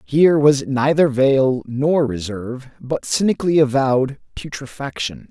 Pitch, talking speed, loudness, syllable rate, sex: 135 Hz, 115 wpm, -18 LUFS, 4.5 syllables/s, male